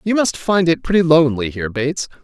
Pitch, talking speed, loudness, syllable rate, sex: 155 Hz, 215 wpm, -17 LUFS, 6.5 syllables/s, male